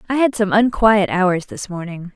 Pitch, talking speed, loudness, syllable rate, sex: 205 Hz, 195 wpm, -17 LUFS, 4.6 syllables/s, female